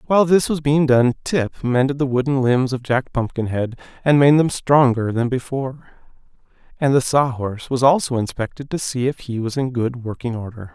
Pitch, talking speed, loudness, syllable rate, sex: 130 Hz, 195 wpm, -19 LUFS, 5.3 syllables/s, male